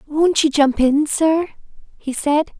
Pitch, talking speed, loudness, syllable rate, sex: 300 Hz, 160 wpm, -17 LUFS, 3.7 syllables/s, female